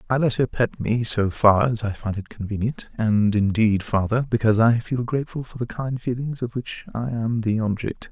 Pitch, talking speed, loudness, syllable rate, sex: 115 Hz, 215 wpm, -23 LUFS, 5.1 syllables/s, male